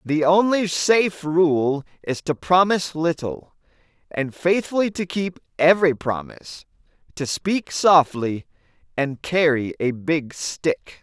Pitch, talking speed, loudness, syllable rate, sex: 160 Hz, 120 wpm, -21 LUFS, 3.9 syllables/s, male